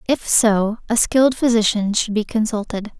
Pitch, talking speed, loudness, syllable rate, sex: 220 Hz, 160 wpm, -18 LUFS, 4.9 syllables/s, female